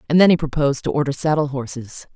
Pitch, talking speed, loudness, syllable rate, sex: 145 Hz, 225 wpm, -19 LUFS, 6.8 syllables/s, female